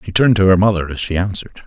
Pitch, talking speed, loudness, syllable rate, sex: 95 Hz, 290 wpm, -15 LUFS, 8.6 syllables/s, male